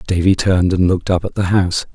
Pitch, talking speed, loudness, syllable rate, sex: 90 Hz, 245 wpm, -16 LUFS, 6.8 syllables/s, male